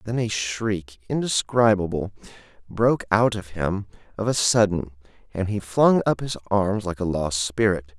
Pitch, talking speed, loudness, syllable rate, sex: 100 Hz, 160 wpm, -23 LUFS, 4.5 syllables/s, male